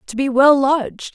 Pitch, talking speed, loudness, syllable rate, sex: 270 Hz, 210 wpm, -15 LUFS, 4.9 syllables/s, female